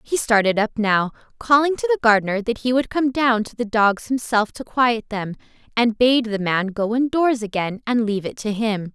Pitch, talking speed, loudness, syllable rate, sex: 230 Hz, 215 wpm, -20 LUFS, 5.1 syllables/s, female